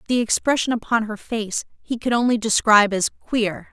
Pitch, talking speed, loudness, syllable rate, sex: 225 Hz, 175 wpm, -20 LUFS, 5.2 syllables/s, female